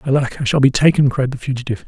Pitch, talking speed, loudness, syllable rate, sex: 130 Hz, 255 wpm, -16 LUFS, 7.4 syllables/s, male